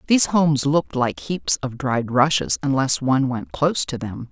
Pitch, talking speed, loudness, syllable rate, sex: 130 Hz, 195 wpm, -20 LUFS, 5.2 syllables/s, female